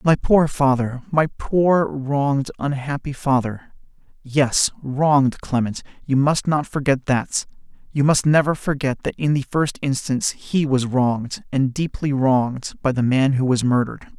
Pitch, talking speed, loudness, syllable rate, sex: 135 Hz, 150 wpm, -20 LUFS, 4.4 syllables/s, male